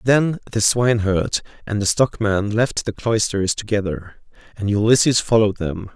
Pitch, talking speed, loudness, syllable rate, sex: 105 Hz, 140 wpm, -19 LUFS, 4.7 syllables/s, male